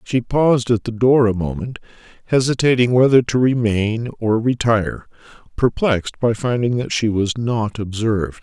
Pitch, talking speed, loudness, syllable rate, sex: 115 Hz, 150 wpm, -18 LUFS, 4.8 syllables/s, male